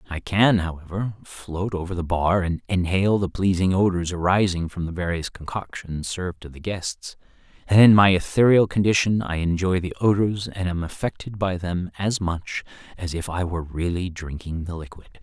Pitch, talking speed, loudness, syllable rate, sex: 90 Hz, 175 wpm, -23 LUFS, 5.0 syllables/s, male